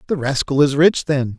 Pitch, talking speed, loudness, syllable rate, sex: 145 Hz, 215 wpm, -17 LUFS, 5.0 syllables/s, male